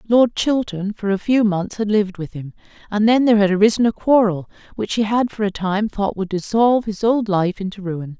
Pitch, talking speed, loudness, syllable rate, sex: 205 Hz, 225 wpm, -18 LUFS, 5.4 syllables/s, female